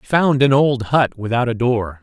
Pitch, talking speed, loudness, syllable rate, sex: 125 Hz, 235 wpm, -17 LUFS, 5.0 syllables/s, male